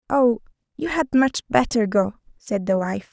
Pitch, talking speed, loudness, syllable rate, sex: 235 Hz, 175 wpm, -22 LUFS, 4.8 syllables/s, female